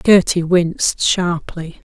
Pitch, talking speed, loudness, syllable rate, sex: 175 Hz, 95 wpm, -16 LUFS, 3.5 syllables/s, female